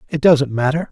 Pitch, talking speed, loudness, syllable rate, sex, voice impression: 145 Hz, 195 wpm, -16 LUFS, 5.5 syllables/s, male, very masculine, old, very thick, very relaxed, slightly weak, very dark, soft, very muffled, slightly fluent, very raspy, very cool, intellectual, sincere, very calm, very mature, friendly, slightly reassuring, very unique, slightly elegant, very wild, slightly sweet, slightly lively, kind, very modest